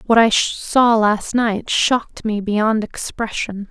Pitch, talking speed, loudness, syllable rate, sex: 220 Hz, 145 wpm, -18 LUFS, 3.4 syllables/s, female